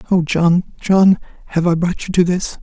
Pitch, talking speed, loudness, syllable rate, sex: 175 Hz, 205 wpm, -16 LUFS, 4.8 syllables/s, male